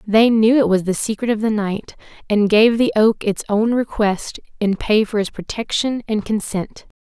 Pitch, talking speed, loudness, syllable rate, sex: 215 Hz, 195 wpm, -18 LUFS, 4.6 syllables/s, female